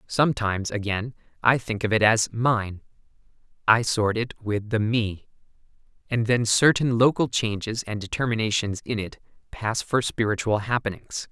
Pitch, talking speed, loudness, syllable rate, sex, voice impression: 110 Hz, 145 wpm, -24 LUFS, 4.7 syllables/s, male, masculine, adult-like, slightly refreshing, sincere, slightly unique, slightly kind